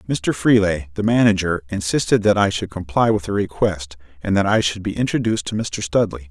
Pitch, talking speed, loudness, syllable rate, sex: 95 Hz, 200 wpm, -19 LUFS, 5.6 syllables/s, male